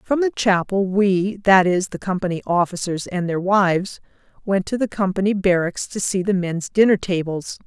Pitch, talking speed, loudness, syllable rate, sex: 190 Hz, 165 wpm, -20 LUFS, 4.8 syllables/s, female